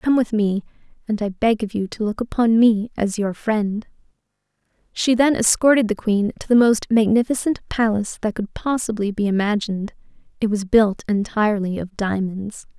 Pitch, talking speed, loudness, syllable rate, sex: 215 Hz, 170 wpm, -20 LUFS, 5.1 syllables/s, female